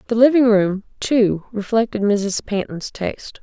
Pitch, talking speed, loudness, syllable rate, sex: 215 Hz, 140 wpm, -19 LUFS, 4.3 syllables/s, female